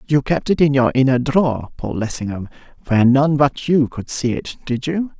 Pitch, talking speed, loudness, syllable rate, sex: 135 Hz, 195 wpm, -18 LUFS, 5.2 syllables/s, male